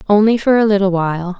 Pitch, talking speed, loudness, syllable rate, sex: 200 Hz, 215 wpm, -14 LUFS, 6.6 syllables/s, female